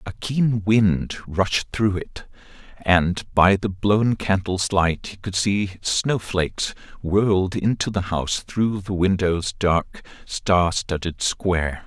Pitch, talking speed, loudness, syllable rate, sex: 95 Hz, 135 wpm, -22 LUFS, 3.4 syllables/s, male